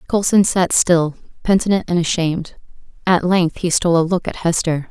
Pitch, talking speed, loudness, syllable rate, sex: 175 Hz, 170 wpm, -17 LUFS, 5.4 syllables/s, female